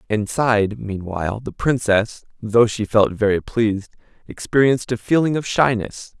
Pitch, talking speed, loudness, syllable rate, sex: 110 Hz, 135 wpm, -19 LUFS, 4.8 syllables/s, male